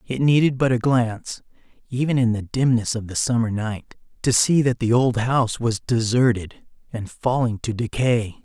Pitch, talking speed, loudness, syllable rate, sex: 120 Hz, 180 wpm, -21 LUFS, 4.8 syllables/s, male